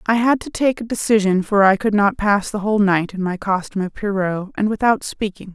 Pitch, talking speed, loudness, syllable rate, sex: 205 Hz, 240 wpm, -18 LUFS, 5.6 syllables/s, female